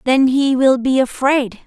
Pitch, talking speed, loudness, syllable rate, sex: 260 Hz, 180 wpm, -15 LUFS, 4.0 syllables/s, female